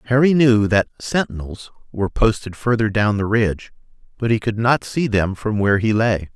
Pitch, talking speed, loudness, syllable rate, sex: 110 Hz, 190 wpm, -18 LUFS, 5.2 syllables/s, male